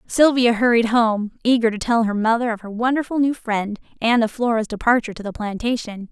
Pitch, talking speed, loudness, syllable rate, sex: 230 Hz, 195 wpm, -20 LUFS, 5.6 syllables/s, female